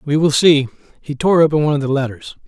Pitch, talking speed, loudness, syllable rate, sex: 145 Hz, 245 wpm, -15 LUFS, 6.6 syllables/s, male